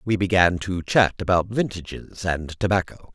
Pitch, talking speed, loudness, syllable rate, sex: 95 Hz, 155 wpm, -22 LUFS, 4.7 syllables/s, male